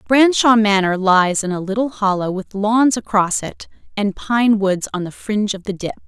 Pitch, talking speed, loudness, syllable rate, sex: 205 Hz, 195 wpm, -17 LUFS, 4.8 syllables/s, female